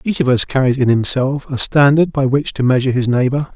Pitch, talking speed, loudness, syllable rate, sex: 135 Hz, 235 wpm, -14 LUFS, 5.8 syllables/s, male